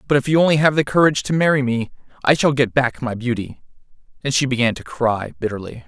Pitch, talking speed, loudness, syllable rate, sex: 130 Hz, 225 wpm, -18 LUFS, 6.3 syllables/s, male